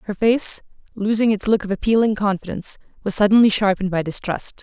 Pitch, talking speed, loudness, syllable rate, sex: 205 Hz, 170 wpm, -19 LUFS, 6.1 syllables/s, female